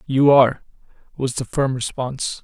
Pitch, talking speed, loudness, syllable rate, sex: 130 Hz, 150 wpm, -19 LUFS, 5.1 syllables/s, male